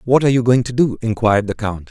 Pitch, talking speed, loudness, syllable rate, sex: 115 Hz, 285 wpm, -16 LUFS, 6.9 syllables/s, male